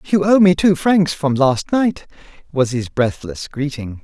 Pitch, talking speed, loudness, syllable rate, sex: 155 Hz, 180 wpm, -17 LUFS, 4.1 syllables/s, male